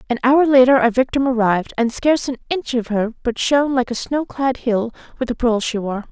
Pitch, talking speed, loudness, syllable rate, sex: 250 Hz, 235 wpm, -18 LUFS, 5.6 syllables/s, female